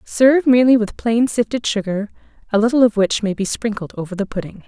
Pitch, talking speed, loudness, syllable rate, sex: 220 Hz, 205 wpm, -17 LUFS, 6.1 syllables/s, female